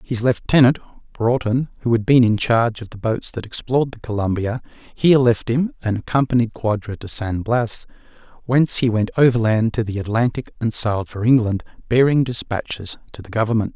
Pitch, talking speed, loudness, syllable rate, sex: 115 Hz, 175 wpm, -19 LUFS, 5.3 syllables/s, male